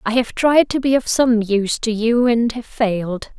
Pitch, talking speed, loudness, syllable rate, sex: 230 Hz, 230 wpm, -17 LUFS, 4.6 syllables/s, female